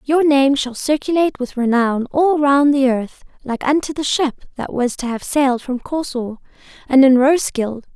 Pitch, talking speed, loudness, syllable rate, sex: 270 Hz, 180 wpm, -17 LUFS, 4.8 syllables/s, female